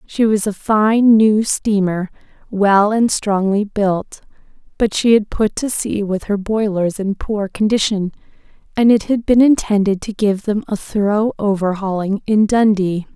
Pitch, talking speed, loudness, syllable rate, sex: 205 Hz, 160 wpm, -16 LUFS, 4.2 syllables/s, female